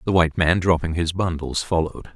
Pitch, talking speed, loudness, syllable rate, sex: 85 Hz, 195 wpm, -21 LUFS, 6.1 syllables/s, male